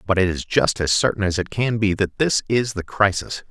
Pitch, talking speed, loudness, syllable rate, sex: 100 Hz, 255 wpm, -20 LUFS, 5.2 syllables/s, male